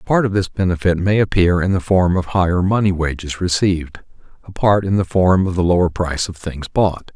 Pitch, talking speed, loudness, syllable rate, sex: 90 Hz, 225 wpm, -17 LUFS, 5.5 syllables/s, male